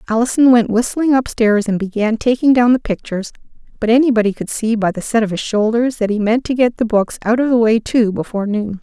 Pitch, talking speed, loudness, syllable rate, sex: 225 Hz, 240 wpm, -15 LUFS, 5.9 syllables/s, female